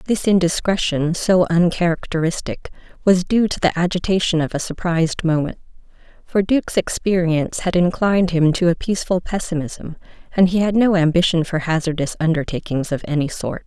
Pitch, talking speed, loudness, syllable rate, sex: 170 Hz, 150 wpm, -19 LUFS, 5.5 syllables/s, female